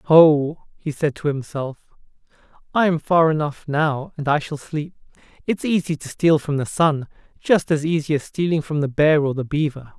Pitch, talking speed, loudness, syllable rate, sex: 150 Hz, 185 wpm, -20 LUFS, 4.8 syllables/s, male